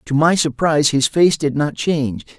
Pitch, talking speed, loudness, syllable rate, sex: 150 Hz, 200 wpm, -17 LUFS, 5.1 syllables/s, male